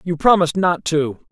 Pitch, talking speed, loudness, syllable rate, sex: 165 Hz, 185 wpm, -17 LUFS, 5.0 syllables/s, male